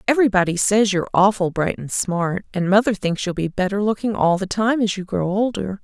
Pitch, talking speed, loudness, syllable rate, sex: 195 Hz, 215 wpm, -20 LUFS, 5.6 syllables/s, female